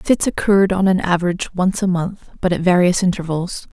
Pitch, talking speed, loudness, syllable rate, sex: 185 Hz, 210 wpm, -18 LUFS, 5.9 syllables/s, female